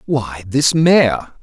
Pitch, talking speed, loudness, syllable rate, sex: 130 Hz, 125 wpm, -15 LUFS, 2.5 syllables/s, male